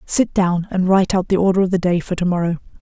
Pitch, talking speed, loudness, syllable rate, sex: 185 Hz, 255 wpm, -18 LUFS, 6.4 syllables/s, female